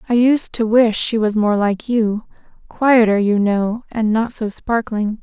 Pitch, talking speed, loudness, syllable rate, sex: 220 Hz, 170 wpm, -17 LUFS, 3.9 syllables/s, female